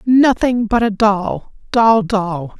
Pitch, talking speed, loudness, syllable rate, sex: 215 Hz, 140 wpm, -15 LUFS, 3.0 syllables/s, female